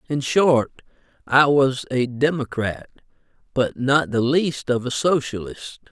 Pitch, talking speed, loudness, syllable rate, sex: 135 Hz, 130 wpm, -20 LUFS, 3.9 syllables/s, male